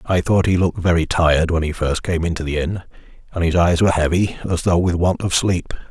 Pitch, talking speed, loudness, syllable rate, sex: 85 Hz, 245 wpm, -18 LUFS, 5.9 syllables/s, male